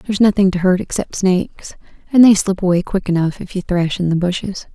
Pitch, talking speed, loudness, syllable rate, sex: 190 Hz, 215 wpm, -16 LUFS, 6.0 syllables/s, female